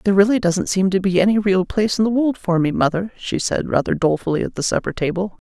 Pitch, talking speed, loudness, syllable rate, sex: 195 Hz, 250 wpm, -19 LUFS, 6.5 syllables/s, female